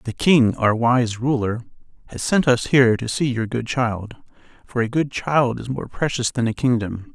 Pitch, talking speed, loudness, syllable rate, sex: 120 Hz, 200 wpm, -20 LUFS, 4.6 syllables/s, male